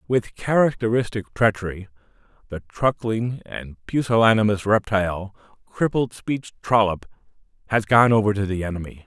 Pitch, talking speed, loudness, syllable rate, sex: 105 Hz, 110 wpm, -21 LUFS, 4.9 syllables/s, male